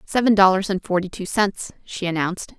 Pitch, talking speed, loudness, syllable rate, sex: 190 Hz, 185 wpm, -20 LUFS, 5.6 syllables/s, female